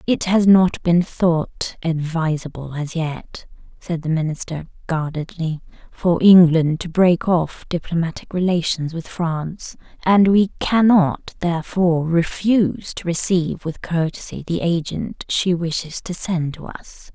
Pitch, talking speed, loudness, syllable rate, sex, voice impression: 170 Hz, 135 wpm, -19 LUFS, 4.1 syllables/s, female, feminine, slightly young, relaxed, slightly weak, soft, muffled, fluent, raspy, slightly cute, calm, slightly friendly, unique, slightly lively, sharp